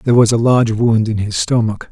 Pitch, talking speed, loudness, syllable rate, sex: 110 Hz, 250 wpm, -14 LUFS, 5.9 syllables/s, male